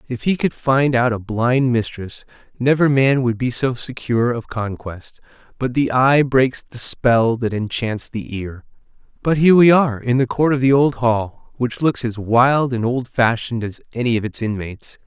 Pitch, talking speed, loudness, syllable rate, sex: 120 Hz, 185 wpm, -18 LUFS, 4.6 syllables/s, male